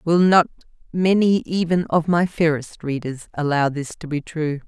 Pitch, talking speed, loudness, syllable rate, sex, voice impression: 160 Hz, 165 wpm, -20 LUFS, 4.4 syllables/s, female, feminine, very adult-like, slightly cool, intellectual, calm, slightly strict